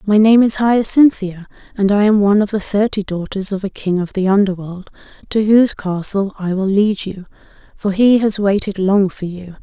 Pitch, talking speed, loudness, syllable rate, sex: 200 Hz, 200 wpm, -15 LUFS, 5.0 syllables/s, female